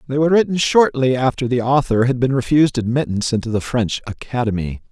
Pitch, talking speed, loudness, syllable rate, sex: 130 Hz, 185 wpm, -18 LUFS, 6.3 syllables/s, male